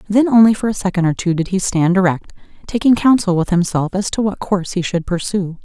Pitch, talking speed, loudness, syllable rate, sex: 190 Hz, 225 wpm, -16 LUFS, 5.9 syllables/s, female